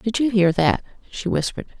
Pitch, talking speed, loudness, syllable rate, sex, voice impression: 200 Hz, 200 wpm, -21 LUFS, 5.7 syllables/s, female, feminine, middle-aged, weak, slightly dark, soft, slightly muffled, halting, intellectual, calm, slightly friendly, reassuring, elegant, lively, kind, modest